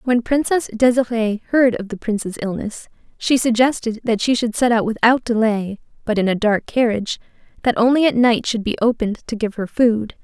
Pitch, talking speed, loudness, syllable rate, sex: 230 Hz, 195 wpm, -18 LUFS, 5.3 syllables/s, female